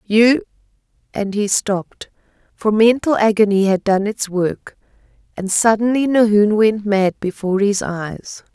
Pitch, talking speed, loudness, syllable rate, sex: 210 Hz, 135 wpm, -16 LUFS, 4.3 syllables/s, female